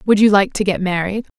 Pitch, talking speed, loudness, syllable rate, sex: 200 Hz, 260 wpm, -16 LUFS, 5.8 syllables/s, female